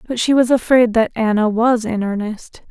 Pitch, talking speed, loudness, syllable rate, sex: 230 Hz, 200 wpm, -16 LUFS, 4.9 syllables/s, female